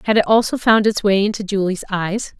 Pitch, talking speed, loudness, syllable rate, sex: 200 Hz, 225 wpm, -17 LUFS, 5.5 syllables/s, female